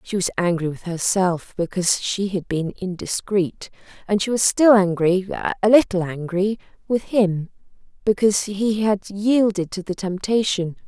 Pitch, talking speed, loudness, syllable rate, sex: 195 Hz, 140 wpm, -20 LUFS, 4.5 syllables/s, female